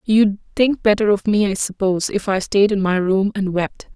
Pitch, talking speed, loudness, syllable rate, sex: 200 Hz, 230 wpm, -18 LUFS, 5.0 syllables/s, female